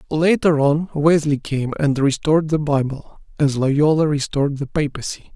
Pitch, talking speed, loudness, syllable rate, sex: 145 Hz, 145 wpm, -19 LUFS, 4.7 syllables/s, male